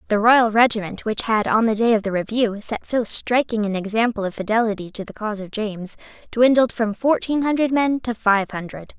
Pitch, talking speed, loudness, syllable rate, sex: 220 Hz, 205 wpm, -20 LUFS, 5.5 syllables/s, female